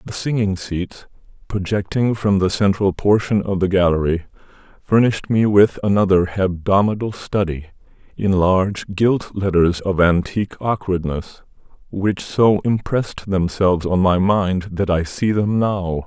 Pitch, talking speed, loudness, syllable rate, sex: 95 Hz, 135 wpm, -18 LUFS, 4.4 syllables/s, male